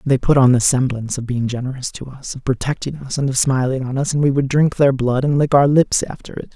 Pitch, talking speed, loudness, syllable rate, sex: 135 Hz, 275 wpm, -17 LUFS, 5.9 syllables/s, male